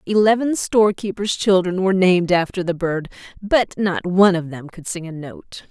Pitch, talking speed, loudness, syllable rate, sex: 185 Hz, 180 wpm, -18 LUFS, 5.2 syllables/s, female